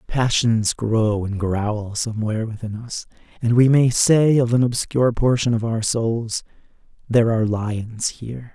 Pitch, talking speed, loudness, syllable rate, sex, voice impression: 115 Hz, 155 wpm, -20 LUFS, 4.5 syllables/s, male, very masculine, slightly old, very thick, slightly relaxed, slightly weak, slightly dark, very soft, slightly muffled, fluent, slightly cool, intellectual, slightly refreshing, sincere, very calm, very mature, very reassuring, slightly unique, elegant, slightly wild, sweet, slightly lively, very kind, slightly modest